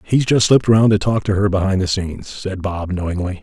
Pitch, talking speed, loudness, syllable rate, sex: 100 Hz, 245 wpm, -17 LUFS, 5.8 syllables/s, male